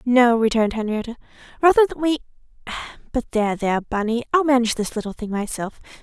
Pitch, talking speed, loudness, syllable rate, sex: 240 Hz, 150 wpm, -21 LUFS, 6.8 syllables/s, female